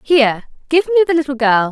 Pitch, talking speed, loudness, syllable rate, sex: 280 Hz, 210 wpm, -15 LUFS, 6.8 syllables/s, female